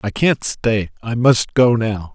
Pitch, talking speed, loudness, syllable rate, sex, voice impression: 115 Hz, 195 wpm, -17 LUFS, 3.7 syllables/s, male, very masculine, very adult-like, slightly old, very thick, tensed, very powerful, slightly dark, slightly hard, slightly muffled, fluent, very cool, intellectual, very sincere, very calm, very mature, very friendly, very reassuring, very unique, wild, kind, very modest